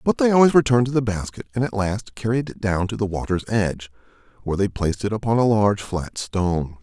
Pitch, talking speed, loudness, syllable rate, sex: 105 Hz, 230 wpm, -21 LUFS, 6.3 syllables/s, male